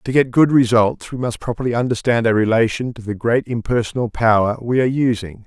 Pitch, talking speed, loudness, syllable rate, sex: 115 Hz, 200 wpm, -18 LUFS, 5.8 syllables/s, male